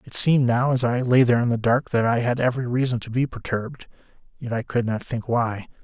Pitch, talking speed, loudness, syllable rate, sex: 120 Hz, 245 wpm, -22 LUFS, 6.1 syllables/s, male